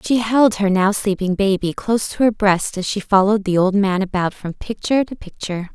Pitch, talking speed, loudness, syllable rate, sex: 200 Hz, 220 wpm, -18 LUFS, 5.5 syllables/s, female